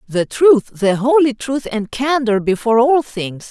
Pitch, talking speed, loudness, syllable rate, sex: 240 Hz, 170 wpm, -16 LUFS, 4.2 syllables/s, female